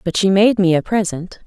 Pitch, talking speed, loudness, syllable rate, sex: 190 Hz, 245 wpm, -15 LUFS, 5.3 syllables/s, female